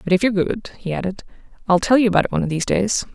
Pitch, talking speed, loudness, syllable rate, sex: 195 Hz, 285 wpm, -19 LUFS, 7.8 syllables/s, female